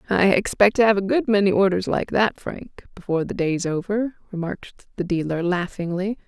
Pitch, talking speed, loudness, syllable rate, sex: 195 Hz, 190 wpm, -21 LUFS, 5.6 syllables/s, female